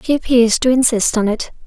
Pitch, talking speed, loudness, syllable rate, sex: 240 Hz, 215 wpm, -15 LUFS, 5.5 syllables/s, female